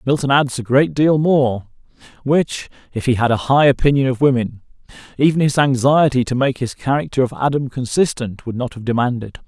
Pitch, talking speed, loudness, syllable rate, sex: 130 Hz, 185 wpm, -17 LUFS, 5.4 syllables/s, male